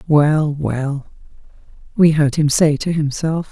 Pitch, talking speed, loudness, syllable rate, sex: 150 Hz, 135 wpm, -16 LUFS, 3.6 syllables/s, female